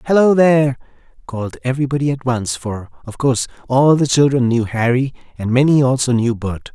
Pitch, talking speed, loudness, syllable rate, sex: 125 Hz, 170 wpm, -16 LUFS, 5.7 syllables/s, male